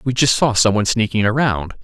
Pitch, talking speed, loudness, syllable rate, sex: 115 Hz, 230 wpm, -16 LUFS, 5.8 syllables/s, male